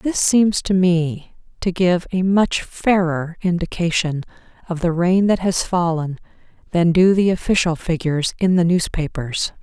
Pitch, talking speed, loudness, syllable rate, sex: 175 Hz, 150 wpm, -18 LUFS, 4.3 syllables/s, female